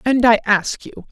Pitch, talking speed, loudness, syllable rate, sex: 225 Hz, 215 wpm, -16 LUFS, 4.4 syllables/s, female